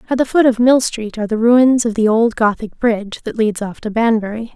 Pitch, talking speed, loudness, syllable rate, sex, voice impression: 225 Hz, 250 wpm, -15 LUFS, 5.6 syllables/s, female, feminine, adult-like, relaxed, slightly weak, soft, raspy, slightly cute, refreshing, friendly, slightly lively, kind, modest